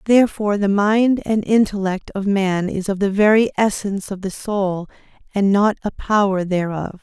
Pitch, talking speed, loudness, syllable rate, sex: 200 Hz, 170 wpm, -18 LUFS, 4.8 syllables/s, female